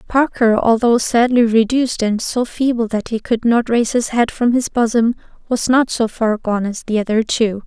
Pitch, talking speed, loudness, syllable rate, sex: 230 Hz, 205 wpm, -16 LUFS, 4.9 syllables/s, female